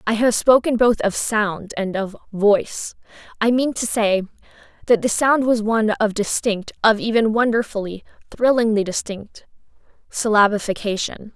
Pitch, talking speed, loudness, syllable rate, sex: 215 Hz, 125 wpm, -19 LUFS, 4.7 syllables/s, female